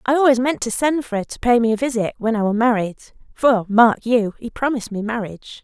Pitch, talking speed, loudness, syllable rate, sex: 235 Hz, 245 wpm, -19 LUFS, 5.9 syllables/s, female